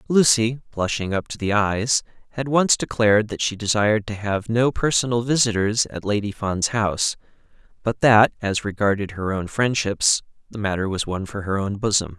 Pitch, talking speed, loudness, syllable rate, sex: 105 Hz, 175 wpm, -21 LUFS, 5.1 syllables/s, male